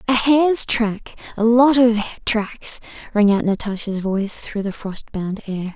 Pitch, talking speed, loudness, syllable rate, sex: 220 Hz, 165 wpm, -19 LUFS, 4.2 syllables/s, female